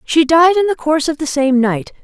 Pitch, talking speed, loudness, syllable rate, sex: 300 Hz, 265 wpm, -14 LUFS, 5.5 syllables/s, female